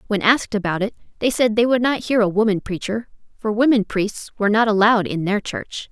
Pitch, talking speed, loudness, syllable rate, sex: 215 Hz, 225 wpm, -19 LUFS, 5.9 syllables/s, female